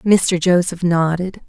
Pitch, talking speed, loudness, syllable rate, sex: 180 Hz, 120 wpm, -17 LUFS, 3.5 syllables/s, female